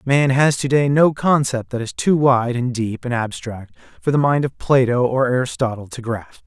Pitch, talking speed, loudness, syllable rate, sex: 125 Hz, 215 wpm, -18 LUFS, 4.8 syllables/s, male